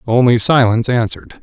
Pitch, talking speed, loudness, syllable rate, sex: 115 Hz, 125 wpm, -13 LUFS, 6.6 syllables/s, male